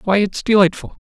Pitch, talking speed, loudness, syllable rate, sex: 200 Hz, 175 wpm, -16 LUFS, 5.6 syllables/s, male